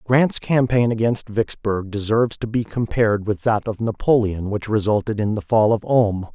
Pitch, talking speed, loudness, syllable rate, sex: 110 Hz, 180 wpm, -20 LUFS, 4.8 syllables/s, male